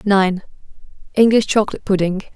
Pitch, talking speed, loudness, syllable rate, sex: 200 Hz, 75 wpm, -17 LUFS, 6.3 syllables/s, female